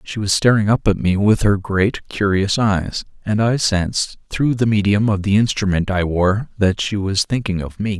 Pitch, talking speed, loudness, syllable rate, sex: 100 Hz, 210 wpm, -18 LUFS, 4.7 syllables/s, male